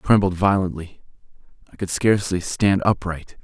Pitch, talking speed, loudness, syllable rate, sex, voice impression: 90 Hz, 140 wpm, -21 LUFS, 5.5 syllables/s, male, very masculine, very adult-like, very middle-aged, very thick, tensed, very powerful, slightly bright, soft, clear, fluent, very cool, very intellectual, refreshing, very sincere, very calm, mature, very friendly, very reassuring, unique, very elegant, wild, very sweet, lively, very kind, slightly intense